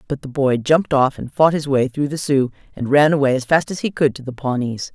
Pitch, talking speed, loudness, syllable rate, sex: 140 Hz, 280 wpm, -18 LUFS, 5.7 syllables/s, female